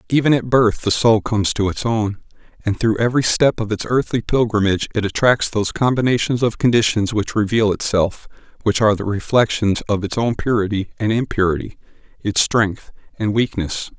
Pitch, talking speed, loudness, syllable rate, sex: 110 Hz, 170 wpm, -18 LUFS, 5.4 syllables/s, male